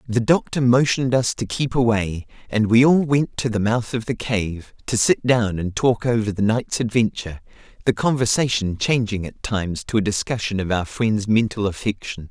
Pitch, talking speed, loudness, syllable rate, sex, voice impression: 110 Hz, 190 wpm, -20 LUFS, 5.0 syllables/s, male, masculine, adult-like, tensed, powerful, bright, clear, fluent, cool, intellectual, refreshing, sincere, friendly, lively, kind